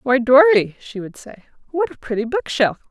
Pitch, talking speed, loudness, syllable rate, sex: 260 Hz, 205 wpm, -17 LUFS, 4.9 syllables/s, female